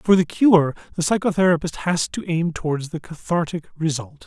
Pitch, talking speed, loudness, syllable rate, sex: 165 Hz, 170 wpm, -21 LUFS, 5.1 syllables/s, male